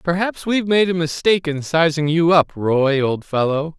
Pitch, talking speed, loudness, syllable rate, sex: 165 Hz, 190 wpm, -18 LUFS, 4.9 syllables/s, male